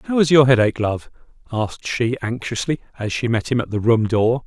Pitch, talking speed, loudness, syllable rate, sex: 120 Hz, 215 wpm, -19 LUFS, 5.6 syllables/s, male